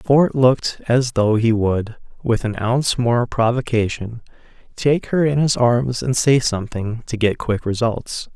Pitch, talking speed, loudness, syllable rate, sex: 120 Hz, 165 wpm, -19 LUFS, 4.2 syllables/s, male